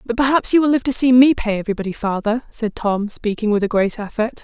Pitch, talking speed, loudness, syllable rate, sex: 230 Hz, 245 wpm, -18 LUFS, 6.1 syllables/s, female